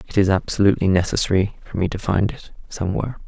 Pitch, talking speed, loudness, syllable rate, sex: 95 Hz, 185 wpm, -20 LUFS, 7.1 syllables/s, male